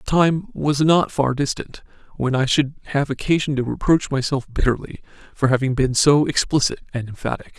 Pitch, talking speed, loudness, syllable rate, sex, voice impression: 140 Hz, 180 wpm, -20 LUFS, 5.4 syllables/s, male, masculine, adult-like, thick, tensed, hard, clear, cool, intellectual, wild, lively